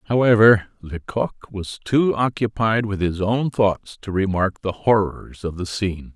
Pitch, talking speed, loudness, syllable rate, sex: 100 Hz, 155 wpm, -20 LUFS, 4.2 syllables/s, male